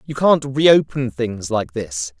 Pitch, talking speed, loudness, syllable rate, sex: 120 Hz, 165 wpm, -18 LUFS, 3.4 syllables/s, male